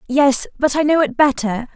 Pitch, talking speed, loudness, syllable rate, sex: 270 Hz, 205 wpm, -16 LUFS, 4.9 syllables/s, female